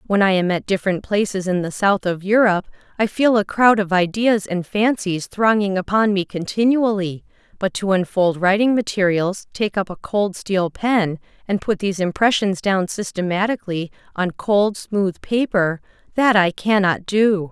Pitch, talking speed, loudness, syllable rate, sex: 195 Hz, 160 wpm, -19 LUFS, 4.7 syllables/s, female